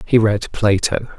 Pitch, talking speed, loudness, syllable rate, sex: 105 Hz, 150 wpm, -17 LUFS, 4.0 syllables/s, male